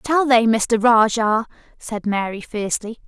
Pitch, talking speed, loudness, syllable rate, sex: 225 Hz, 135 wpm, -18 LUFS, 4.3 syllables/s, female